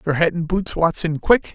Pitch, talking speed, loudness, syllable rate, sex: 165 Hz, 235 wpm, -20 LUFS, 4.9 syllables/s, male